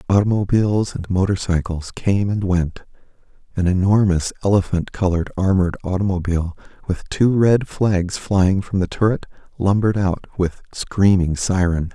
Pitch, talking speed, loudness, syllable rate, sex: 95 Hz, 125 wpm, -19 LUFS, 4.9 syllables/s, male